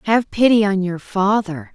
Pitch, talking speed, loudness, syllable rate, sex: 200 Hz, 170 wpm, -17 LUFS, 4.4 syllables/s, female